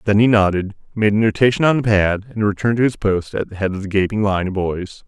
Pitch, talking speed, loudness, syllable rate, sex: 105 Hz, 270 wpm, -18 LUFS, 6.2 syllables/s, male